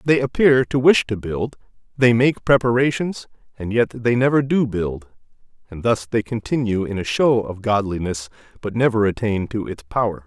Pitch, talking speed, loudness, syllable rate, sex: 115 Hz, 175 wpm, -20 LUFS, 4.9 syllables/s, male